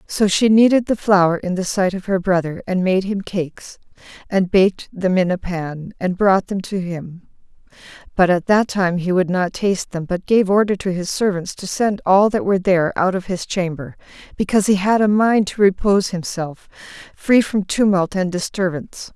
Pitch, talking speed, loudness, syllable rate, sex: 190 Hz, 200 wpm, -18 LUFS, 5.0 syllables/s, female